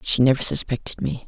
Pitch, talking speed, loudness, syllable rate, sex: 130 Hz, 190 wpm, -20 LUFS, 6.0 syllables/s, female